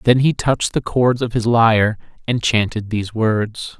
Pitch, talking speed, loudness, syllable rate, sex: 115 Hz, 190 wpm, -18 LUFS, 4.7 syllables/s, male